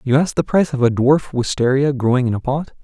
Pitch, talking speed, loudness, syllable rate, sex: 135 Hz, 255 wpm, -17 LUFS, 6.3 syllables/s, male